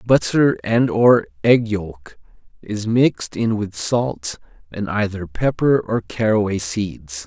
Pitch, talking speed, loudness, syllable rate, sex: 105 Hz, 130 wpm, -19 LUFS, 3.6 syllables/s, male